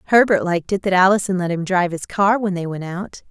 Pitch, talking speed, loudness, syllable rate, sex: 185 Hz, 255 wpm, -18 LUFS, 6.3 syllables/s, female